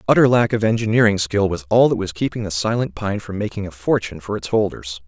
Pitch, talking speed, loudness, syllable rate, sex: 105 Hz, 235 wpm, -19 LUFS, 6.2 syllables/s, male